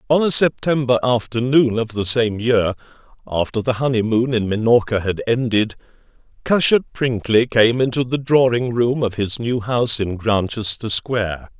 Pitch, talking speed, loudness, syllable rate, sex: 115 Hz, 150 wpm, -18 LUFS, 4.7 syllables/s, male